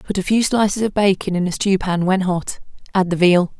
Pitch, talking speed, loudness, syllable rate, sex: 190 Hz, 250 wpm, -18 LUFS, 5.4 syllables/s, female